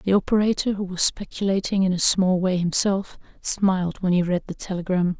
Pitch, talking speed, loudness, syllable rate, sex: 185 Hz, 185 wpm, -22 LUFS, 5.3 syllables/s, female